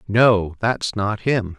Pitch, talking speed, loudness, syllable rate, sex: 105 Hz, 150 wpm, -20 LUFS, 2.9 syllables/s, male